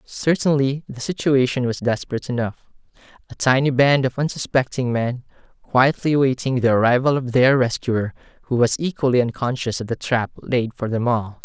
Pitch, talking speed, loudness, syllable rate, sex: 125 Hz, 155 wpm, -20 LUFS, 5.3 syllables/s, male